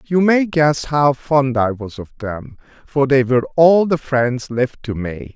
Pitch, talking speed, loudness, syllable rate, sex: 135 Hz, 200 wpm, -17 LUFS, 4.0 syllables/s, male